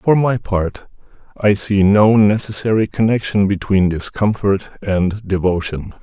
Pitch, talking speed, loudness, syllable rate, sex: 100 Hz, 120 wpm, -16 LUFS, 4.1 syllables/s, male